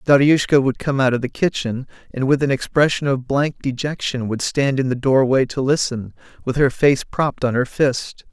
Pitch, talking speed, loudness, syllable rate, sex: 135 Hz, 200 wpm, -19 LUFS, 5.1 syllables/s, male